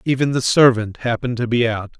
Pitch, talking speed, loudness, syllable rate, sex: 120 Hz, 210 wpm, -17 LUFS, 5.9 syllables/s, male